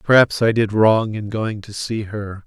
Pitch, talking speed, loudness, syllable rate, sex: 105 Hz, 220 wpm, -19 LUFS, 4.2 syllables/s, male